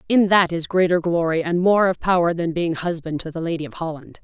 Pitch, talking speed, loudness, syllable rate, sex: 170 Hz, 240 wpm, -20 LUFS, 5.7 syllables/s, female